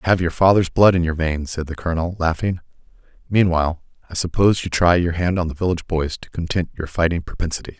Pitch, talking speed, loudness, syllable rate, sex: 85 Hz, 215 wpm, -20 LUFS, 6.5 syllables/s, male